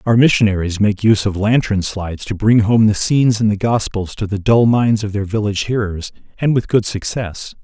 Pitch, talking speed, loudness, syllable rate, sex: 105 Hz, 210 wpm, -16 LUFS, 5.4 syllables/s, male